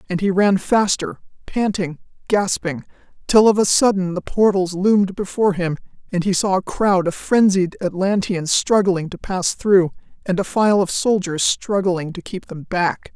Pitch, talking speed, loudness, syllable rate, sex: 190 Hz, 170 wpm, -18 LUFS, 4.5 syllables/s, female